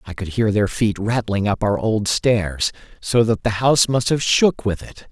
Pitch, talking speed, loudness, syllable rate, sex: 110 Hz, 225 wpm, -19 LUFS, 4.5 syllables/s, male